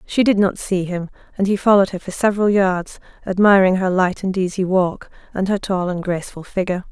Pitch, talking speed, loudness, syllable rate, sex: 190 Hz, 210 wpm, -18 LUFS, 5.9 syllables/s, female